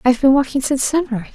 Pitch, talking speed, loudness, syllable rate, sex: 265 Hz, 270 wpm, -17 LUFS, 8.5 syllables/s, female